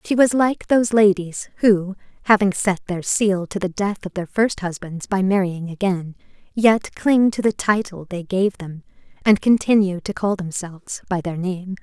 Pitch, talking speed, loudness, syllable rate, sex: 195 Hz, 185 wpm, -20 LUFS, 4.6 syllables/s, female